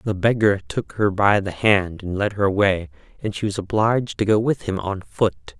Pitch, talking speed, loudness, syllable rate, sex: 100 Hz, 225 wpm, -21 LUFS, 5.0 syllables/s, male